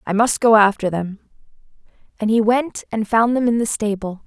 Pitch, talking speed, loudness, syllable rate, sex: 220 Hz, 195 wpm, -18 LUFS, 5.0 syllables/s, female